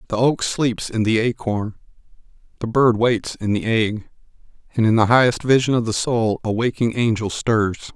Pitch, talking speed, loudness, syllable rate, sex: 115 Hz, 180 wpm, -19 LUFS, 4.8 syllables/s, male